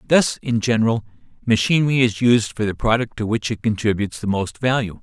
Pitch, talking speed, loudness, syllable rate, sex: 115 Hz, 190 wpm, -20 LUFS, 5.9 syllables/s, male